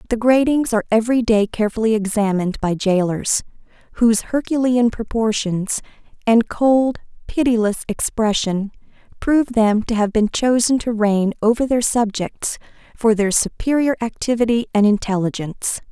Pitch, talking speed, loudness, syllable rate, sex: 225 Hz, 125 wpm, -18 LUFS, 5.1 syllables/s, female